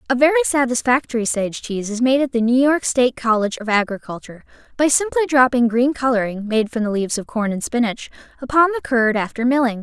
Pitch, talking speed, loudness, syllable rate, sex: 245 Hz, 200 wpm, -18 LUFS, 6.3 syllables/s, female